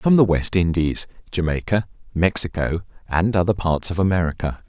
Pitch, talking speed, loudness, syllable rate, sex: 90 Hz, 140 wpm, -21 LUFS, 5.1 syllables/s, male